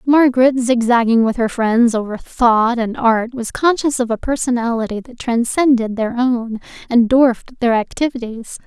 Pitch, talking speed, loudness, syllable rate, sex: 240 Hz, 150 wpm, -16 LUFS, 4.7 syllables/s, female